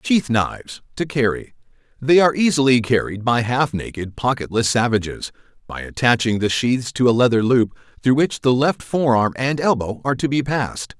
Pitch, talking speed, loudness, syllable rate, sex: 125 Hz, 170 wpm, -19 LUFS, 5.2 syllables/s, male